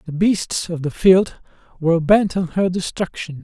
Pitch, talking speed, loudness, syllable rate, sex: 175 Hz, 175 wpm, -18 LUFS, 4.5 syllables/s, male